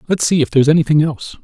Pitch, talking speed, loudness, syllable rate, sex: 150 Hz, 250 wpm, -14 LUFS, 8.3 syllables/s, male